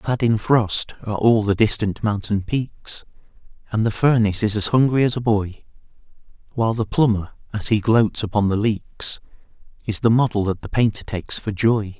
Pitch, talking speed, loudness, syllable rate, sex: 110 Hz, 180 wpm, -20 LUFS, 5.1 syllables/s, male